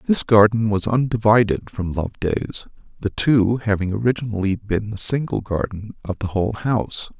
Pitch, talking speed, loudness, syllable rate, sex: 105 Hz, 150 wpm, -20 LUFS, 5.0 syllables/s, male